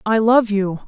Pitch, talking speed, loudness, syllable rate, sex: 215 Hz, 205 wpm, -16 LUFS, 4.2 syllables/s, female